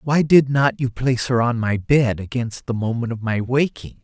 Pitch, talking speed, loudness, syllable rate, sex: 120 Hz, 225 wpm, -20 LUFS, 4.8 syllables/s, male